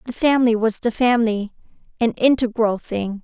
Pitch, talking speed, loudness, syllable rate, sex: 230 Hz, 150 wpm, -19 LUFS, 5.3 syllables/s, female